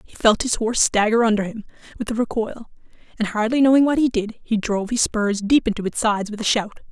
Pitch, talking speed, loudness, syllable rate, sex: 220 Hz, 235 wpm, -20 LUFS, 6.1 syllables/s, female